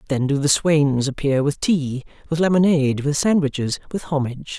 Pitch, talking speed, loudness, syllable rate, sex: 145 Hz, 170 wpm, -20 LUFS, 5.2 syllables/s, female